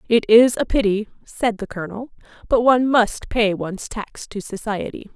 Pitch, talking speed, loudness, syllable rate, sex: 220 Hz, 175 wpm, -19 LUFS, 5.0 syllables/s, female